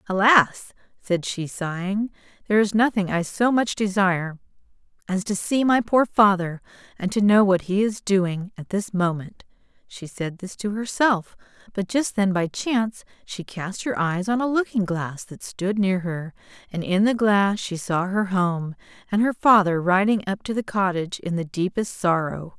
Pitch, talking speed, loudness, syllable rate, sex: 195 Hz, 185 wpm, -22 LUFS, 4.6 syllables/s, female